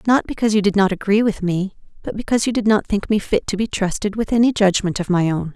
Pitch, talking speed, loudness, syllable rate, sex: 205 Hz, 260 wpm, -19 LUFS, 6.5 syllables/s, female